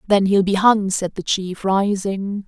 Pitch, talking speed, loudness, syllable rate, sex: 195 Hz, 195 wpm, -19 LUFS, 3.9 syllables/s, female